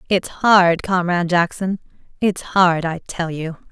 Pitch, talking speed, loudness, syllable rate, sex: 175 Hz, 145 wpm, -18 LUFS, 4.0 syllables/s, female